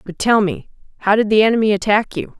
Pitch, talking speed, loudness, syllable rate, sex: 210 Hz, 225 wpm, -16 LUFS, 6.2 syllables/s, female